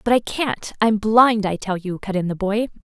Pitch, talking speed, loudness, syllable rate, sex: 210 Hz, 230 wpm, -20 LUFS, 4.8 syllables/s, female